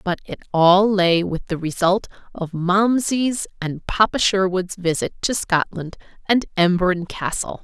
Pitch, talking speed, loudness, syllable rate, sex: 185 Hz, 140 wpm, -20 LUFS, 4.2 syllables/s, female